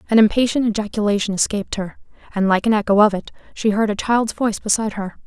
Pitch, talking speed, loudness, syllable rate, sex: 210 Hz, 205 wpm, -19 LUFS, 6.7 syllables/s, female